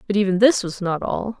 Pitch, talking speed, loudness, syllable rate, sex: 200 Hz, 255 wpm, -20 LUFS, 5.7 syllables/s, female